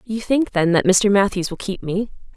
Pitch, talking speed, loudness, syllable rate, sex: 200 Hz, 230 wpm, -19 LUFS, 4.9 syllables/s, female